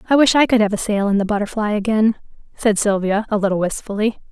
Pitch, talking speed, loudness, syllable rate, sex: 210 Hz, 225 wpm, -18 LUFS, 6.4 syllables/s, female